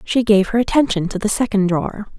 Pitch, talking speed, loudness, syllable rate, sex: 210 Hz, 220 wpm, -17 LUFS, 6.0 syllables/s, female